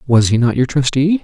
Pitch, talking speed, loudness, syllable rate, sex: 135 Hz, 245 wpm, -14 LUFS, 5.5 syllables/s, male